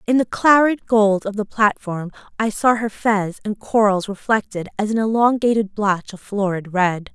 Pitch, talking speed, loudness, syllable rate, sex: 210 Hz, 175 wpm, -19 LUFS, 4.6 syllables/s, female